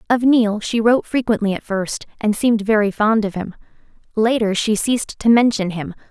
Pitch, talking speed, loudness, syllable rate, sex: 215 Hz, 185 wpm, -18 LUFS, 5.4 syllables/s, female